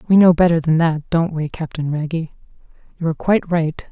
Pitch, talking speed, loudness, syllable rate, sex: 165 Hz, 200 wpm, -18 LUFS, 6.0 syllables/s, female